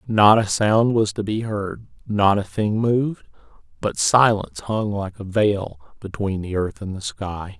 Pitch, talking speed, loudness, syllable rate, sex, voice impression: 105 Hz, 180 wpm, -21 LUFS, 4.1 syllables/s, male, masculine, middle-aged, tensed, powerful, raspy, cool, mature, wild, lively, strict, intense, sharp